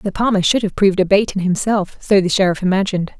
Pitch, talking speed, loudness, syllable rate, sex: 195 Hz, 245 wpm, -16 LUFS, 6.5 syllables/s, female